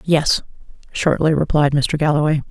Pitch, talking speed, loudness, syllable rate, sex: 150 Hz, 120 wpm, -17 LUFS, 4.8 syllables/s, female